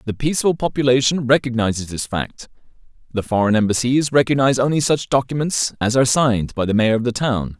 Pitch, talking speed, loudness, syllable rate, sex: 125 Hz, 175 wpm, -18 LUFS, 6.1 syllables/s, male